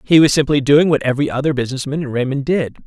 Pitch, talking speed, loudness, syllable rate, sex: 140 Hz, 250 wpm, -16 LUFS, 7.0 syllables/s, male